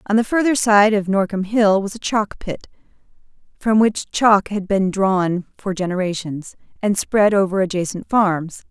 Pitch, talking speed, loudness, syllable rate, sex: 200 Hz, 165 wpm, -18 LUFS, 4.6 syllables/s, female